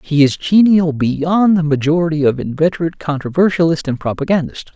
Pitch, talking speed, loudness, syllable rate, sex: 160 Hz, 140 wpm, -15 LUFS, 5.6 syllables/s, male